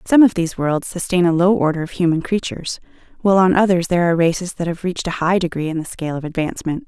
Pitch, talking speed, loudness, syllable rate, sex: 175 Hz, 245 wpm, -18 LUFS, 7.1 syllables/s, female